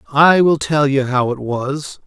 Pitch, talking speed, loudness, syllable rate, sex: 140 Hz, 205 wpm, -16 LUFS, 3.9 syllables/s, male